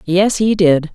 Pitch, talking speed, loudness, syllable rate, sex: 185 Hz, 190 wpm, -14 LUFS, 3.5 syllables/s, female